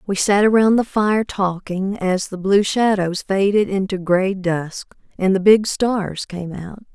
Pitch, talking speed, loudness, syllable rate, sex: 195 Hz, 175 wpm, -18 LUFS, 3.9 syllables/s, female